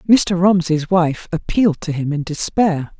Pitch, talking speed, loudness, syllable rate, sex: 170 Hz, 160 wpm, -17 LUFS, 4.3 syllables/s, female